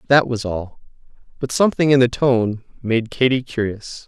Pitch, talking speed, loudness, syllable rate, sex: 120 Hz, 160 wpm, -19 LUFS, 4.8 syllables/s, male